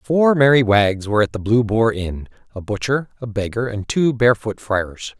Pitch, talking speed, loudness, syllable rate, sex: 115 Hz, 195 wpm, -18 LUFS, 4.8 syllables/s, male